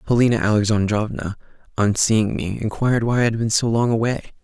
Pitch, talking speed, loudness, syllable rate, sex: 110 Hz, 175 wpm, -20 LUFS, 5.8 syllables/s, male